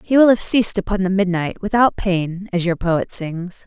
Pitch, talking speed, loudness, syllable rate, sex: 190 Hz, 215 wpm, -18 LUFS, 4.9 syllables/s, female